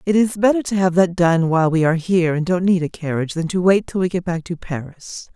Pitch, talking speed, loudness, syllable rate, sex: 175 Hz, 280 wpm, -18 LUFS, 6.1 syllables/s, female